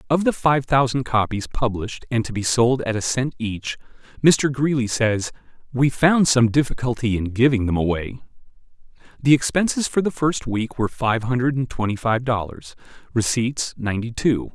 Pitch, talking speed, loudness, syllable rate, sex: 125 Hz, 170 wpm, -21 LUFS, 5.0 syllables/s, male